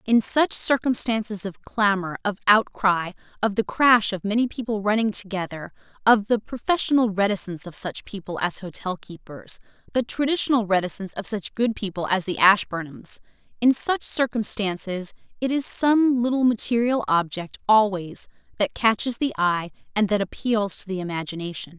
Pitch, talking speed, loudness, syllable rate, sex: 210 Hz, 150 wpm, -23 LUFS, 5.0 syllables/s, female